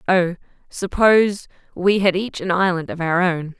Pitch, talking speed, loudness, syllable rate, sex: 185 Hz, 165 wpm, -19 LUFS, 4.6 syllables/s, female